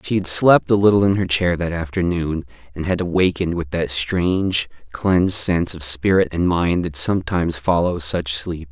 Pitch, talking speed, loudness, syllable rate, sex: 85 Hz, 185 wpm, -19 LUFS, 5.1 syllables/s, male